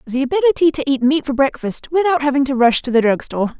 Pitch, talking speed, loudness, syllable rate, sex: 275 Hz, 235 wpm, -16 LUFS, 6.4 syllables/s, female